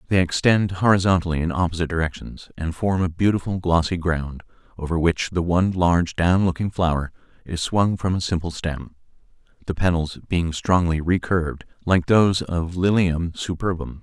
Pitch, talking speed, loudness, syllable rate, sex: 85 Hz, 155 wpm, -21 LUFS, 5.2 syllables/s, male